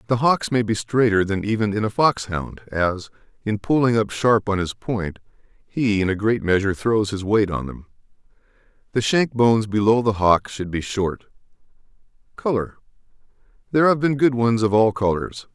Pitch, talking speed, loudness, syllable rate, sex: 110 Hz, 175 wpm, -21 LUFS, 5.0 syllables/s, male